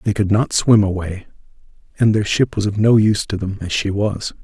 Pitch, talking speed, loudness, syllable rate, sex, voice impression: 105 Hz, 230 wpm, -17 LUFS, 5.4 syllables/s, male, masculine, adult-like, slightly thick, muffled, cool, calm, reassuring, slightly elegant, slightly sweet